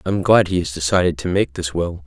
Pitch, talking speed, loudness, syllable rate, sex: 85 Hz, 290 wpm, -18 LUFS, 6.1 syllables/s, male